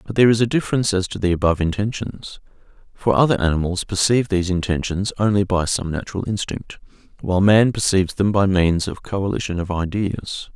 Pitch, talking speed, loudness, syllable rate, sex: 95 Hz, 175 wpm, -20 LUFS, 6.2 syllables/s, male